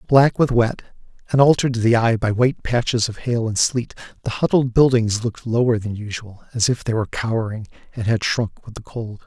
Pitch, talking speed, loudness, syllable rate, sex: 115 Hz, 215 wpm, -19 LUFS, 5.6 syllables/s, male